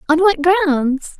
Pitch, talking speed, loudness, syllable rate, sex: 325 Hz, 150 wpm, -15 LUFS, 3.1 syllables/s, female